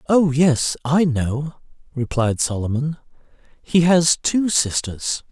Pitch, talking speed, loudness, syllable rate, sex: 145 Hz, 115 wpm, -19 LUFS, 3.5 syllables/s, male